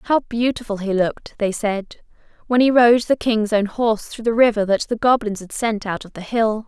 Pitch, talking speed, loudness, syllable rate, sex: 220 Hz, 225 wpm, -19 LUFS, 5.0 syllables/s, female